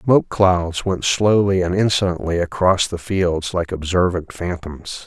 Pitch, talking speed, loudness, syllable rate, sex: 90 Hz, 140 wpm, -19 LUFS, 4.2 syllables/s, male